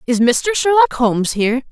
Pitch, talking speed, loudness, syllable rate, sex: 275 Hz, 175 wpm, -15 LUFS, 5.3 syllables/s, female